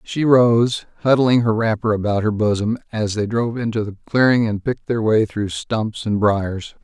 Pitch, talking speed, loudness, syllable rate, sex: 110 Hz, 195 wpm, -19 LUFS, 4.8 syllables/s, male